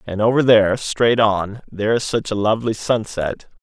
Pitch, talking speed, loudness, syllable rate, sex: 110 Hz, 180 wpm, -18 LUFS, 5.1 syllables/s, male